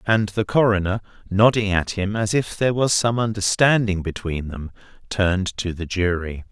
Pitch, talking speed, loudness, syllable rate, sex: 100 Hz, 165 wpm, -21 LUFS, 4.9 syllables/s, male